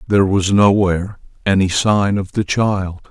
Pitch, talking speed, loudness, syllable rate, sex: 100 Hz, 155 wpm, -16 LUFS, 4.6 syllables/s, male